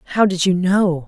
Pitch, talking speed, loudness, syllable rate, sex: 180 Hz, 225 wpm, -17 LUFS, 5.3 syllables/s, female